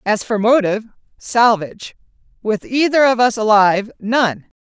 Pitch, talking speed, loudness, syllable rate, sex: 220 Hz, 115 wpm, -16 LUFS, 4.8 syllables/s, female